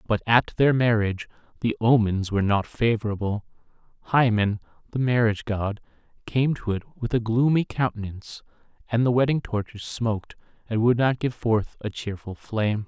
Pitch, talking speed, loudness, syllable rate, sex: 110 Hz, 155 wpm, -24 LUFS, 5.3 syllables/s, male